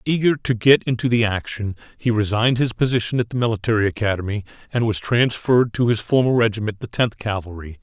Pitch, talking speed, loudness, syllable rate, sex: 115 Hz, 185 wpm, -20 LUFS, 6.1 syllables/s, male